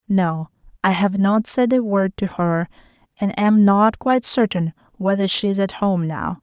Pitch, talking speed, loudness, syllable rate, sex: 195 Hz, 185 wpm, -19 LUFS, 4.4 syllables/s, female